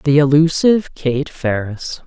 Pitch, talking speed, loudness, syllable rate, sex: 145 Hz, 115 wpm, -16 LUFS, 4.0 syllables/s, female